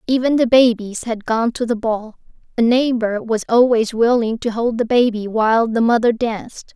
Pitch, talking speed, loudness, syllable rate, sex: 230 Hz, 185 wpm, -17 LUFS, 4.9 syllables/s, female